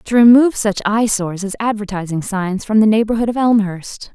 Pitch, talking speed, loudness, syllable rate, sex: 210 Hz, 175 wpm, -15 LUFS, 5.5 syllables/s, female